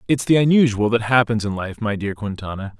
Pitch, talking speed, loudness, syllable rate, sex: 115 Hz, 215 wpm, -19 LUFS, 5.8 syllables/s, male